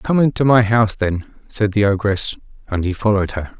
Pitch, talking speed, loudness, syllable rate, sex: 105 Hz, 200 wpm, -17 LUFS, 5.5 syllables/s, male